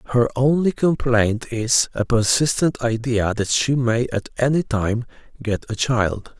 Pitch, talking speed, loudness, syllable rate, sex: 120 Hz, 150 wpm, -20 LUFS, 4.1 syllables/s, male